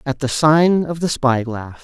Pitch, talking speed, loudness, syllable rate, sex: 145 Hz, 230 wpm, -17 LUFS, 4.1 syllables/s, male